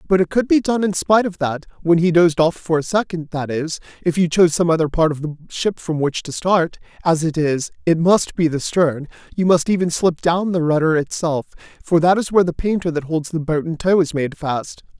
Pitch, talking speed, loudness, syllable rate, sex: 165 Hz, 250 wpm, -18 LUFS, 5.5 syllables/s, male